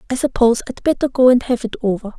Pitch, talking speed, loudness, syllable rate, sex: 245 Hz, 245 wpm, -17 LUFS, 7.1 syllables/s, female